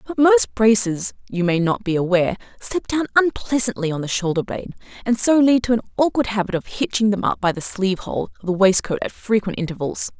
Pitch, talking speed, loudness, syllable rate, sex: 210 Hz, 210 wpm, -20 LUFS, 5.8 syllables/s, female